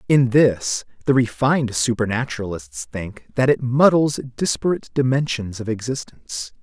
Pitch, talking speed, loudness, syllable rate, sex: 120 Hz, 120 wpm, -20 LUFS, 4.9 syllables/s, male